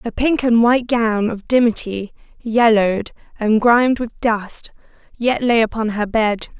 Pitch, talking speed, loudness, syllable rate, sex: 225 Hz, 155 wpm, -17 LUFS, 4.4 syllables/s, female